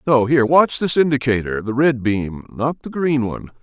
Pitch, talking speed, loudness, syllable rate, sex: 130 Hz, 165 wpm, -18 LUFS, 5.1 syllables/s, male